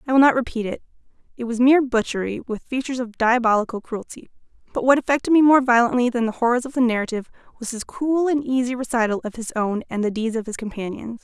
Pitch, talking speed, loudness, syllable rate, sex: 240 Hz, 220 wpm, -21 LUFS, 6.7 syllables/s, female